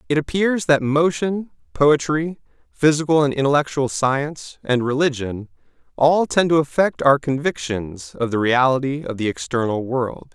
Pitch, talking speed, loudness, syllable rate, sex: 140 Hz, 140 wpm, -19 LUFS, 4.6 syllables/s, male